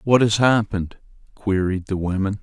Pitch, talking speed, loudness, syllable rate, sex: 100 Hz, 150 wpm, -20 LUFS, 5.0 syllables/s, male